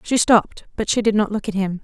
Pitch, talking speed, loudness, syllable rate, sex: 205 Hz, 295 wpm, -19 LUFS, 6.1 syllables/s, female